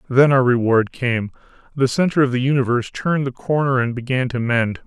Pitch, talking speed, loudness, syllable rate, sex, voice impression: 130 Hz, 195 wpm, -19 LUFS, 5.7 syllables/s, male, very masculine, slightly old, thick, slightly tensed, very powerful, bright, soft, muffled, fluent, slightly raspy, slightly cool, intellectual, refreshing, slightly sincere, calm, very mature, friendly, very reassuring, unique, slightly elegant, very wild, slightly sweet, lively, kind, slightly intense